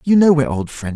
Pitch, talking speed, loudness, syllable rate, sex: 145 Hz, 380 wpm, -16 LUFS, 7.8 syllables/s, male